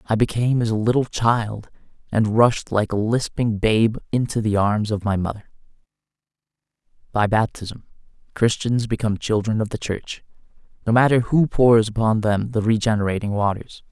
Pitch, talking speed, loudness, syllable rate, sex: 110 Hz, 150 wpm, -20 LUFS, 5.1 syllables/s, male